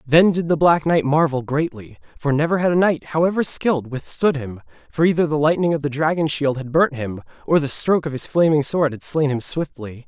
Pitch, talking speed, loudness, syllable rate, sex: 150 Hz, 225 wpm, -19 LUFS, 5.5 syllables/s, male